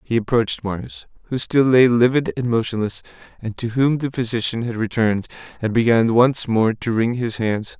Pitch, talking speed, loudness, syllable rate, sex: 115 Hz, 185 wpm, -19 LUFS, 5.2 syllables/s, male